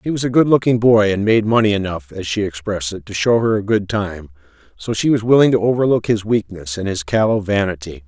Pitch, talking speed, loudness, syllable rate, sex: 110 Hz, 240 wpm, -17 LUFS, 5.8 syllables/s, male